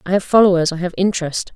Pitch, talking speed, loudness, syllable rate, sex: 180 Hz, 195 wpm, -16 LUFS, 7.2 syllables/s, female